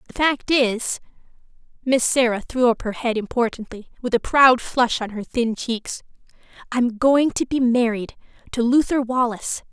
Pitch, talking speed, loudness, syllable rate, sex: 240 Hz, 150 wpm, -20 LUFS, 4.6 syllables/s, female